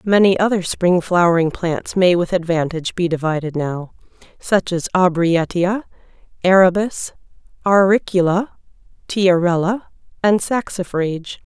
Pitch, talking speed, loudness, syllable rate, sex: 180 Hz, 100 wpm, -17 LUFS, 4.4 syllables/s, female